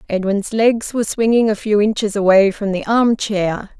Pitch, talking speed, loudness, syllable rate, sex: 210 Hz, 190 wpm, -16 LUFS, 4.8 syllables/s, female